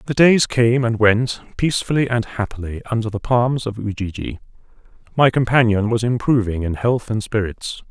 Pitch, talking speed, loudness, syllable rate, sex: 115 Hz, 160 wpm, -19 LUFS, 5.1 syllables/s, male